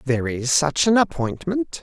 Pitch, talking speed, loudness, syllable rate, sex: 160 Hz, 165 wpm, -20 LUFS, 4.7 syllables/s, male